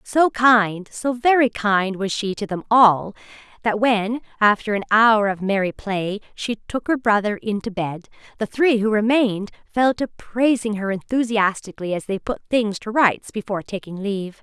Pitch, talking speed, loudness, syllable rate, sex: 215 Hz, 180 wpm, -20 LUFS, 4.7 syllables/s, female